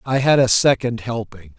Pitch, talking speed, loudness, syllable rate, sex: 120 Hz, 190 wpm, -17 LUFS, 4.8 syllables/s, male